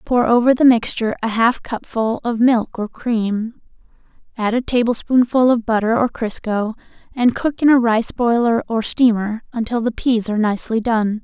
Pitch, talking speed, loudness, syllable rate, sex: 230 Hz, 170 wpm, -17 LUFS, 4.8 syllables/s, female